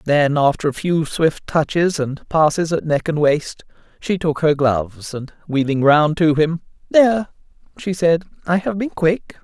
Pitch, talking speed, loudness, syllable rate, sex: 160 Hz, 180 wpm, -18 LUFS, 4.4 syllables/s, male